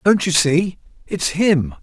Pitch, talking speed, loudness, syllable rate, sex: 170 Hz, 165 wpm, -17 LUFS, 3.6 syllables/s, male